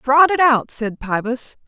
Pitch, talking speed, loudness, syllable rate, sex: 255 Hz, 180 wpm, -17 LUFS, 4.0 syllables/s, female